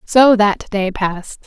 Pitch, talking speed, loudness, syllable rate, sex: 210 Hz, 165 wpm, -15 LUFS, 3.8 syllables/s, female